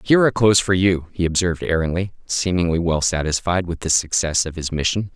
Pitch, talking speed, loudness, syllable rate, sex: 90 Hz, 200 wpm, -19 LUFS, 5.9 syllables/s, male